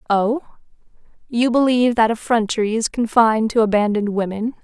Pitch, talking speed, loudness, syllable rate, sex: 225 Hz, 130 wpm, -18 LUFS, 5.8 syllables/s, female